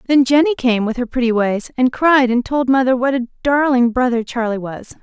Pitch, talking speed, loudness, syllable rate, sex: 250 Hz, 215 wpm, -16 LUFS, 5.2 syllables/s, female